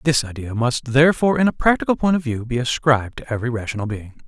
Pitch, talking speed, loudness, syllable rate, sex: 130 Hz, 225 wpm, -20 LUFS, 6.8 syllables/s, male